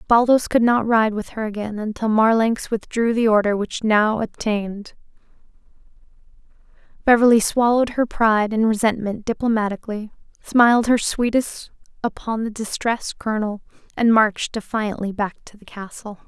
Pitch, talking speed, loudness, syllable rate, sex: 220 Hz, 135 wpm, -20 LUFS, 5.2 syllables/s, female